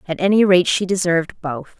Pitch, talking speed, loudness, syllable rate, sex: 175 Hz, 200 wpm, -17 LUFS, 5.6 syllables/s, female